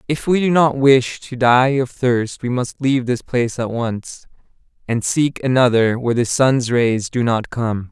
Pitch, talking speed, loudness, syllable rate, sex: 125 Hz, 195 wpm, -17 LUFS, 4.3 syllables/s, male